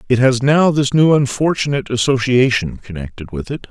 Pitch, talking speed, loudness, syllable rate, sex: 125 Hz, 160 wpm, -15 LUFS, 5.5 syllables/s, male